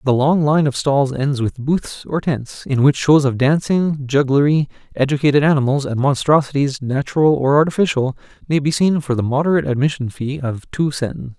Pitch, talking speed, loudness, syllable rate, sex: 140 Hz, 180 wpm, -17 LUFS, 5.2 syllables/s, male